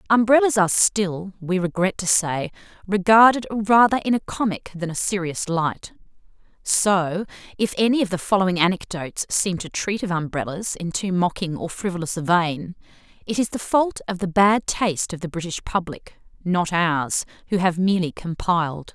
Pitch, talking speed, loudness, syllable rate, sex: 185 Hz, 170 wpm, -21 LUFS, 5.0 syllables/s, female